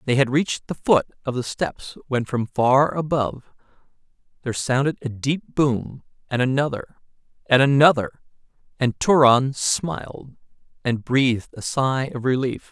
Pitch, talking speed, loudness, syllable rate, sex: 130 Hz, 140 wpm, -21 LUFS, 4.6 syllables/s, male